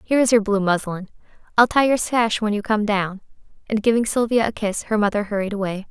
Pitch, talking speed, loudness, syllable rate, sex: 215 Hz, 215 wpm, -20 LUFS, 5.9 syllables/s, female